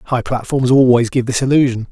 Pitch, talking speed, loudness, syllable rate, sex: 125 Hz, 190 wpm, -14 LUFS, 5.4 syllables/s, male